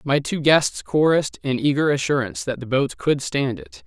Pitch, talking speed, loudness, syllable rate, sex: 140 Hz, 200 wpm, -21 LUFS, 5.1 syllables/s, male